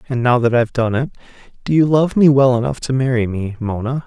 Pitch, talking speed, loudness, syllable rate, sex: 125 Hz, 220 wpm, -16 LUFS, 6.0 syllables/s, male